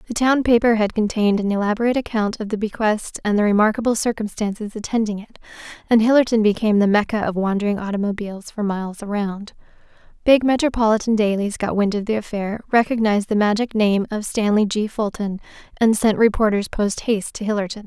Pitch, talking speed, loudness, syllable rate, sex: 215 Hz, 170 wpm, -20 LUFS, 6.2 syllables/s, female